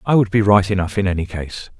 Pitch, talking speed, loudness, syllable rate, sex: 100 Hz, 270 wpm, -17 LUFS, 6.2 syllables/s, male